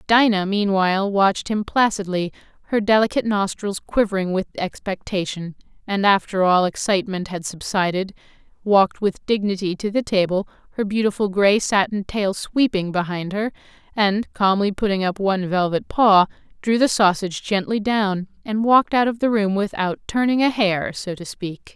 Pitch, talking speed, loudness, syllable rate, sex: 200 Hz, 155 wpm, -20 LUFS, 5.1 syllables/s, female